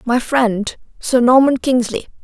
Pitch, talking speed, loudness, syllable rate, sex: 245 Hz, 135 wpm, -15 LUFS, 3.9 syllables/s, female